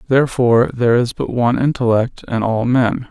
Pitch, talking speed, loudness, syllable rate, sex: 120 Hz, 175 wpm, -16 LUFS, 5.6 syllables/s, male